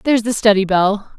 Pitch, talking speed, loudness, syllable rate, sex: 210 Hz, 205 wpm, -15 LUFS, 5.9 syllables/s, female